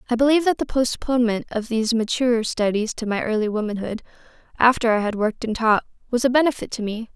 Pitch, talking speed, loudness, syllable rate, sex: 230 Hz, 200 wpm, -21 LUFS, 6.6 syllables/s, female